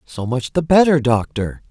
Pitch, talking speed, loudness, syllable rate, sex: 135 Hz, 175 wpm, -17 LUFS, 4.5 syllables/s, male